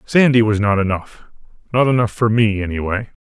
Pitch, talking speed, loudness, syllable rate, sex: 110 Hz, 170 wpm, -17 LUFS, 5.5 syllables/s, male